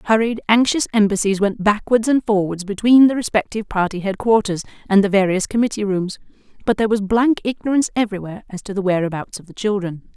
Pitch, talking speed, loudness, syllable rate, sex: 205 Hz, 175 wpm, -18 LUFS, 6.3 syllables/s, female